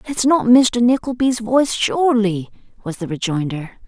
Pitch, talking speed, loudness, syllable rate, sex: 225 Hz, 140 wpm, -17 LUFS, 4.9 syllables/s, female